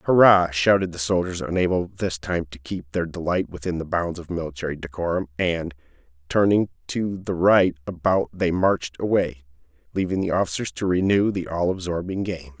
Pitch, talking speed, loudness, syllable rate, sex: 85 Hz, 165 wpm, -23 LUFS, 5.3 syllables/s, male